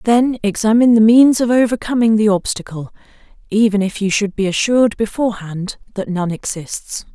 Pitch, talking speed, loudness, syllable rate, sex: 215 Hz, 150 wpm, -15 LUFS, 5.3 syllables/s, female